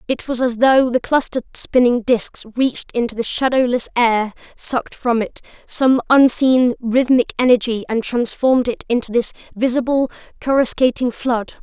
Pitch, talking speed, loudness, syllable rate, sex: 245 Hz, 145 wpm, -17 LUFS, 4.9 syllables/s, female